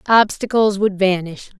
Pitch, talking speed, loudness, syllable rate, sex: 200 Hz, 115 wpm, -17 LUFS, 4.4 syllables/s, female